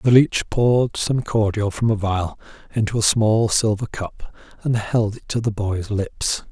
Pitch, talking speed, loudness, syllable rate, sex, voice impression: 110 Hz, 185 wpm, -20 LUFS, 4.2 syllables/s, male, very masculine, very adult-like, very middle-aged, thick, tensed, very powerful, slightly bright, slightly muffled, fluent, slightly raspy, very cool, very intellectual, slightly refreshing, very sincere, calm, very mature, very friendly, very reassuring, slightly unique, very elegant, sweet, slightly lively, very kind